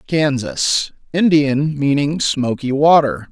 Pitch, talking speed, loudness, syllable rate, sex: 145 Hz, 70 wpm, -16 LUFS, 3.4 syllables/s, male